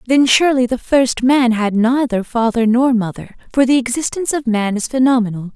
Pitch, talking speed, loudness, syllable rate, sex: 245 Hz, 185 wpm, -15 LUFS, 5.4 syllables/s, female